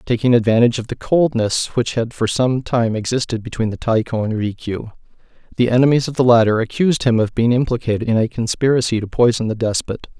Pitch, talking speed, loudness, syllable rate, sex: 120 Hz, 195 wpm, -17 LUFS, 6.0 syllables/s, male